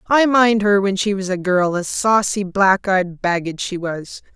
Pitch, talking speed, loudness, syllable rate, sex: 195 Hz, 195 wpm, -17 LUFS, 4.4 syllables/s, female